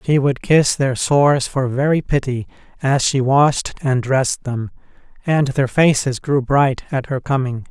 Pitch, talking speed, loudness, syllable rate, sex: 135 Hz, 170 wpm, -17 LUFS, 4.3 syllables/s, male